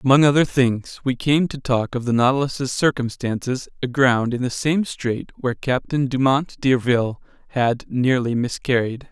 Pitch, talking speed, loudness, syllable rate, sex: 130 Hz, 150 wpm, -20 LUFS, 4.7 syllables/s, male